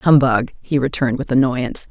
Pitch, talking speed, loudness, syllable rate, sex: 130 Hz, 160 wpm, -18 LUFS, 5.7 syllables/s, female